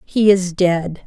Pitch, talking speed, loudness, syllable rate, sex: 185 Hz, 170 wpm, -16 LUFS, 3.1 syllables/s, female